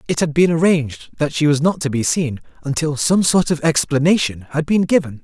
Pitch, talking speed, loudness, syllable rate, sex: 155 Hz, 220 wpm, -17 LUFS, 5.6 syllables/s, male